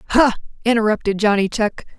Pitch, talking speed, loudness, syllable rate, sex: 220 Hz, 120 wpm, -18 LUFS, 6.4 syllables/s, female